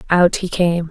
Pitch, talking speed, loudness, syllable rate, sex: 175 Hz, 200 wpm, -17 LUFS, 4.2 syllables/s, female